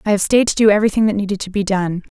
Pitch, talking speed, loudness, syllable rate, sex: 205 Hz, 300 wpm, -16 LUFS, 7.8 syllables/s, female